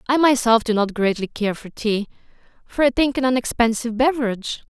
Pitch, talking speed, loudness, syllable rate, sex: 235 Hz, 190 wpm, -20 LUFS, 5.9 syllables/s, female